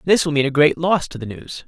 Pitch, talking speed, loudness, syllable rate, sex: 155 Hz, 325 wpm, -18 LUFS, 5.9 syllables/s, male